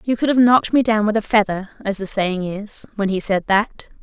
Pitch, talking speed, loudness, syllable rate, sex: 210 Hz, 255 wpm, -18 LUFS, 5.2 syllables/s, female